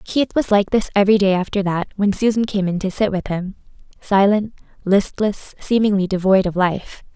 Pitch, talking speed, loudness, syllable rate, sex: 200 Hz, 175 wpm, -18 LUFS, 5.1 syllables/s, female